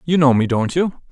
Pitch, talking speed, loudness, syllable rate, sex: 145 Hz, 270 wpm, -17 LUFS, 5.5 syllables/s, male